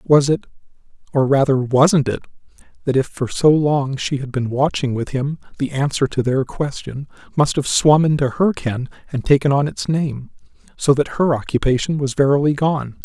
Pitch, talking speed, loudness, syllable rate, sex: 140 Hz, 175 wpm, -18 LUFS, 4.9 syllables/s, male